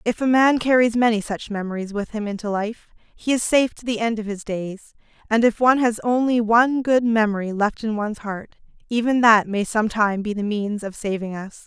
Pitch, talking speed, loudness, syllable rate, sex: 220 Hz, 215 wpm, -21 LUFS, 5.7 syllables/s, female